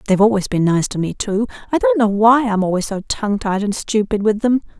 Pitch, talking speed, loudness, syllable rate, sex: 215 Hz, 250 wpm, -17 LUFS, 6.3 syllables/s, female